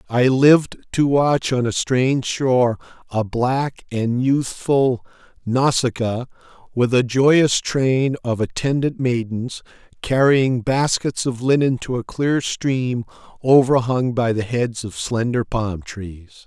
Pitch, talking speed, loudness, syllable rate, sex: 125 Hz, 130 wpm, -19 LUFS, 3.7 syllables/s, male